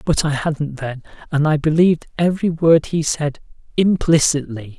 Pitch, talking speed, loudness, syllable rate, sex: 155 Hz, 150 wpm, -18 LUFS, 4.8 syllables/s, male